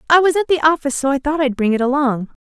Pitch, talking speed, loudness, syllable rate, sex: 285 Hz, 295 wpm, -16 LUFS, 7.5 syllables/s, female